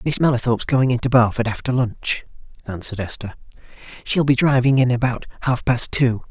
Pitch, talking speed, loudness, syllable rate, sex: 125 Hz, 160 wpm, -19 LUFS, 5.8 syllables/s, male